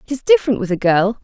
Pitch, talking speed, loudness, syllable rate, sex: 230 Hz, 290 wpm, -16 LUFS, 7.3 syllables/s, female